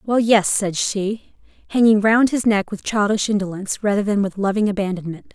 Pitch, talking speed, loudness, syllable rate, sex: 205 Hz, 180 wpm, -19 LUFS, 5.3 syllables/s, female